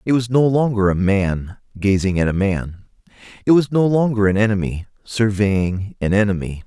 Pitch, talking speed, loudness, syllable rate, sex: 105 Hz, 170 wpm, -18 LUFS, 4.9 syllables/s, male